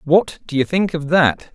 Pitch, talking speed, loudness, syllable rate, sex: 160 Hz, 235 wpm, -18 LUFS, 4.4 syllables/s, male